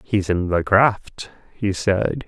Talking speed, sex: 160 wpm, male